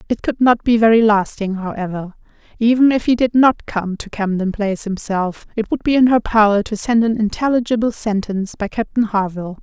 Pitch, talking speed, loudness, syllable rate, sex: 215 Hz, 195 wpm, -17 LUFS, 5.5 syllables/s, female